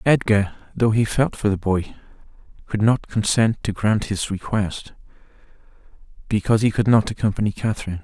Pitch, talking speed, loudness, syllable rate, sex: 105 Hz, 150 wpm, -21 LUFS, 5.4 syllables/s, male